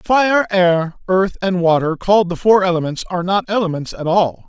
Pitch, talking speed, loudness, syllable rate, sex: 185 Hz, 190 wpm, -16 LUFS, 5.1 syllables/s, male